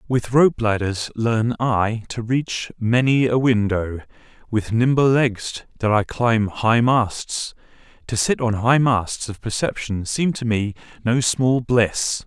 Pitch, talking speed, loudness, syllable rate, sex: 115 Hz, 150 wpm, -20 LUFS, 3.7 syllables/s, male